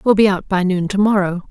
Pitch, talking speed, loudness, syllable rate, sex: 195 Hz, 240 wpm, -16 LUFS, 5.9 syllables/s, female